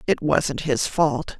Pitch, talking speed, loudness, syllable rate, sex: 145 Hz, 170 wpm, -22 LUFS, 3.2 syllables/s, female